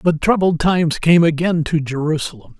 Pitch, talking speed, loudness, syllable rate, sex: 160 Hz, 160 wpm, -16 LUFS, 5.2 syllables/s, male